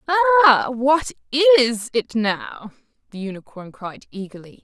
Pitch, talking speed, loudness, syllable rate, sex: 255 Hz, 115 wpm, -17 LUFS, 5.1 syllables/s, female